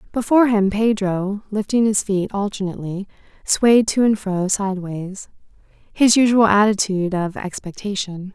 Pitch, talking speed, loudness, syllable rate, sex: 205 Hz, 115 wpm, -19 LUFS, 4.7 syllables/s, female